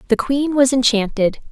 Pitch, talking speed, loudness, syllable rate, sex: 250 Hz, 160 wpm, -17 LUFS, 4.9 syllables/s, female